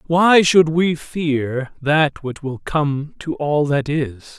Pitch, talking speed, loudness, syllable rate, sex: 150 Hz, 165 wpm, -18 LUFS, 2.9 syllables/s, male